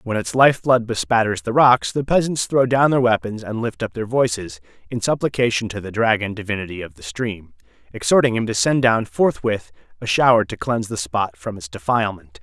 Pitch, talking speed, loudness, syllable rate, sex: 110 Hz, 205 wpm, -19 LUFS, 5.5 syllables/s, male